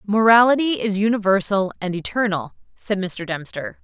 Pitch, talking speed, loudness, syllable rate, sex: 205 Hz, 125 wpm, -19 LUFS, 5.0 syllables/s, female